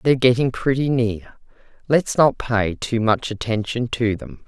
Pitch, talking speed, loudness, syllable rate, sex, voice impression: 115 Hz, 160 wpm, -20 LUFS, 4.4 syllables/s, female, masculine, slightly feminine, gender-neutral, very adult-like, slightly middle-aged, thick, tensed, slightly weak, slightly dark, hard, slightly muffled, slightly halting, very cool, intellectual, sincere, very calm, slightly friendly, slightly reassuring, very unique, slightly elegant, strict